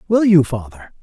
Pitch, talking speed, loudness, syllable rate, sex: 180 Hz, 175 wpm, -15 LUFS, 5.1 syllables/s, male